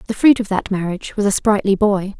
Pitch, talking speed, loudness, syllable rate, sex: 205 Hz, 245 wpm, -17 LUFS, 6.0 syllables/s, female